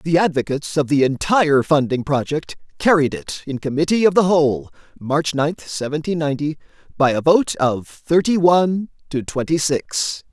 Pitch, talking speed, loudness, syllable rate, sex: 150 Hz, 155 wpm, -19 LUFS, 4.4 syllables/s, male